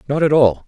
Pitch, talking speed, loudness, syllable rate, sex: 140 Hz, 265 wpm, -15 LUFS, 6.5 syllables/s, male